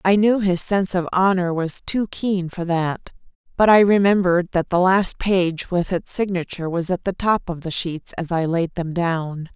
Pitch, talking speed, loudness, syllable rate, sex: 180 Hz, 205 wpm, -20 LUFS, 4.6 syllables/s, female